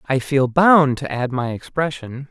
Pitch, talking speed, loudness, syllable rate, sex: 140 Hz, 180 wpm, -18 LUFS, 4.1 syllables/s, male